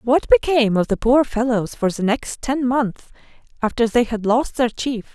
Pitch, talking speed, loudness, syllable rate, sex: 240 Hz, 200 wpm, -19 LUFS, 4.6 syllables/s, female